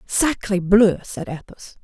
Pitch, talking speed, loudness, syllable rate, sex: 200 Hz, 130 wpm, -19 LUFS, 3.7 syllables/s, female